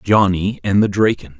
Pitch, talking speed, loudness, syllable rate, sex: 100 Hz, 175 wpm, -16 LUFS, 4.6 syllables/s, male